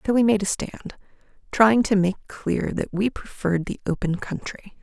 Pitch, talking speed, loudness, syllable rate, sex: 200 Hz, 185 wpm, -23 LUFS, 4.7 syllables/s, female